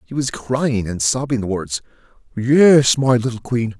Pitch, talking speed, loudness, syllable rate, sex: 120 Hz, 175 wpm, -17 LUFS, 4.2 syllables/s, male